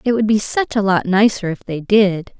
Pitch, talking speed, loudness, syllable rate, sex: 200 Hz, 250 wpm, -16 LUFS, 4.8 syllables/s, female